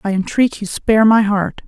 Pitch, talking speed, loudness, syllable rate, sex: 210 Hz, 215 wpm, -15 LUFS, 5.2 syllables/s, female